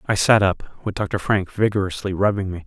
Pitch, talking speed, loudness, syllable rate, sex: 100 Hz, 205 wpm, -21 LUFS, 5.2 syllables/s, male